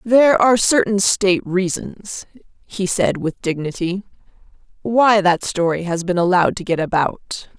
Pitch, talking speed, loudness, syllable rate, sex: 190 Hz, 140 wpm, -17 LUFS, 4.6 syllables/s, female